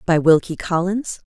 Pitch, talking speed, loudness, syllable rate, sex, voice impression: 175 Hz, 135 wpm, -18 LUFS, 4.5 syllables/s, female, very feminine, adult-like, slightly fluent, intellectual, slightly elegant